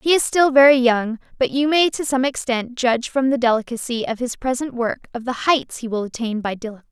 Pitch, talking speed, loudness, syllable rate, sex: 250 Hz, 235 wpm, -19 LUFS, 5.8 syllables/s, female